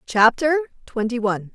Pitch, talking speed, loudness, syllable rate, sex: 245 Hz, 115 wpm, -20 LUFS, 5.0 syllables/s, female